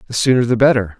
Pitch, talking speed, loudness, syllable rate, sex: 120 Hz, 240 wpm, -14 LUFS, 7.4 syllables/s, male